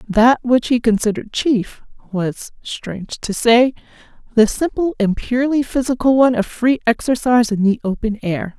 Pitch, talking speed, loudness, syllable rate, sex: 235 Hz, 155 wpm, -17 LUFS, 4.8 syllables/s, female